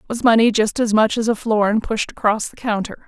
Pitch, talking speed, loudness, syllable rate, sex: 220 Hz, 255 wpm, -18 LUFS, 5.6 syllables/s, female